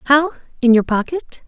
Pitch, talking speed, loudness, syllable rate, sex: 270 Hz, 120 wpm, -17 LUFS, 5.1 syllables/s, female